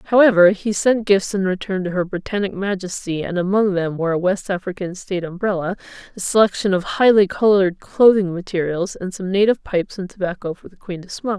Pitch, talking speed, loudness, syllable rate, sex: 190 Hz, 195 wpm, -19 LUFS, 6.0 syllables/s, female